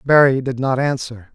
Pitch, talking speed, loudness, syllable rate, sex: 130 Hz, 180 wpm, -17 LUFS, 4.8 syllables/s, male